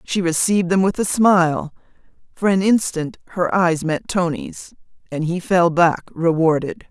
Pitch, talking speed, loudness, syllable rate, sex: 175 Hz, 155 wpm, -18 LUFS, 4.5 syllables/s, female